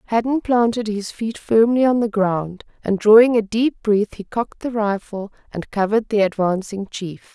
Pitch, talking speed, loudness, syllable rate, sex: 215 Hz, 180 wpm, -19 LUFS, 4.8 syllables/s, female